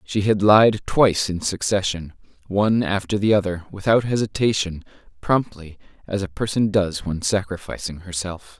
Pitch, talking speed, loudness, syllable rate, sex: 100 Hz, 140 wpm, -21 LUFS, 4.9 syllables/s, male